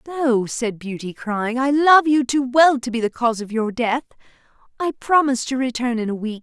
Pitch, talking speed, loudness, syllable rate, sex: 250 Hz, 215 wpm, -19 LUFS, 5.1 syllables/s, female